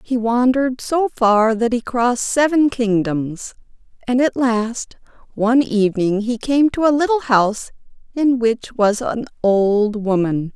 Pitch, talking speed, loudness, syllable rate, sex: 235 Hz, 150 wpm, -17 LUFS, 4.2 syllables/s, female